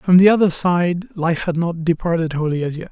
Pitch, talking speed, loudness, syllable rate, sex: 170 Hz, 225 wpm, -18 LUFS, 5.2 syllables/s, male